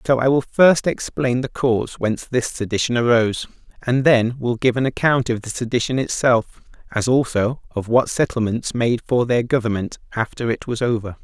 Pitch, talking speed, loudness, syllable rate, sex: 120 Hz, 180 wpm, -19 LUFS, 5.1 syllables/s, male